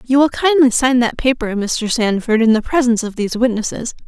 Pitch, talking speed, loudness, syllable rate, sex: 240 Hz, 205 wpm, -15 LUFS, 5.9 syllables/s, female